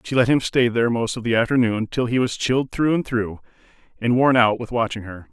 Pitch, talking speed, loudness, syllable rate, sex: 120 Hz, 250 wpm, -20 LUFS, 5.9 syllables/s, male